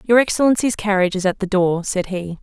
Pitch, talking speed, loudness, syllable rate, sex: 200 Hz, 225 wpm, -18 LUFS, 6.1 syllables/s, female